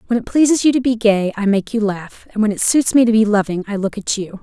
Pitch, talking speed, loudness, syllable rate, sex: 220 Hz, 300 wpm, -16 LUFS, 5.8 syllables/s, female